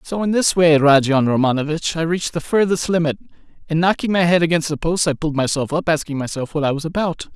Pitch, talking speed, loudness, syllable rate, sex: 160 Hz, 230 wpm, -18 LUFS, 6.2 syllables/s, male